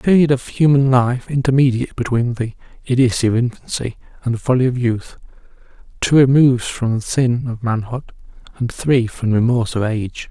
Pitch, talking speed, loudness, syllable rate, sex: 125 Hz, 170 wpm, -17 LUFS, 5.7 syllables/s, male